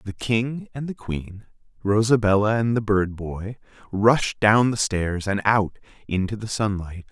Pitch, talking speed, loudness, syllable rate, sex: 105 Hz, 160 wpm, -22 LUFS, 4.1 syllables/s, male